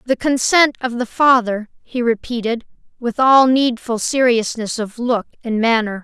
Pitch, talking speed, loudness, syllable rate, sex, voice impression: 240 Hz, 150 wpm, -17 LUFS, 4.4 syllables/s, female, feminine, slightly young, tensed, bright, clear, slightly halting, slightly cute, slightly friendly, slightly sharp